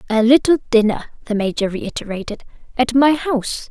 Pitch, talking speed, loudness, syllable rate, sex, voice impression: 235 Hz, 145 wpm, -17 LUFS, 5.5 syllables/s, female, very feminine, young, thin, tensed, slightly weak, bright, hard, very clear, very fluent, very cute, intellectual, very refreshing, very sincere, slightly calm, very friendly, very reassuring, very unique, elegant, very sweet, lively, strict, slightly intense, slightly modest, very light